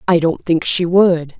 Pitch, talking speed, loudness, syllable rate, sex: 170 Hz, 215 wpm, -15 LUFS, 4.1 syllables/s, female